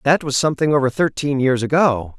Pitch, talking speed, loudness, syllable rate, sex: 140 Hz, 190 wpm, -18 LUFS, 5.8 syllables/s, male